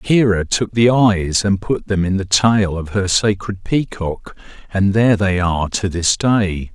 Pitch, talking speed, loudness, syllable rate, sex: 100 Hz, 185 wpm, -17 LUFS, 4.1 syllables/s, male